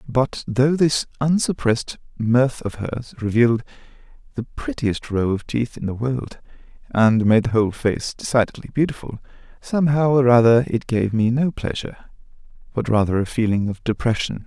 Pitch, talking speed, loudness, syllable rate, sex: 120 Hz, 155 wpm, -20 LUFS, 5.0 syllables/s, male